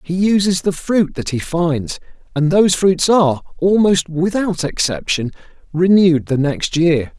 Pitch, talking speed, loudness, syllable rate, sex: 170 Hz, 150 wpm, -16 LUFS, 4.4 syllables/s, male